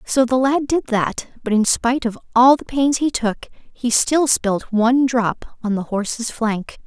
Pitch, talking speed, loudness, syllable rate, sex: 240 Hz, 200 wpm, -18 LUFS, 4.1 syllables/s, female